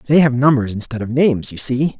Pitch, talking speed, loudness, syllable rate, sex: 130 Hz, 240 wpm, -16 LUFS, 6.1 syllables/s, male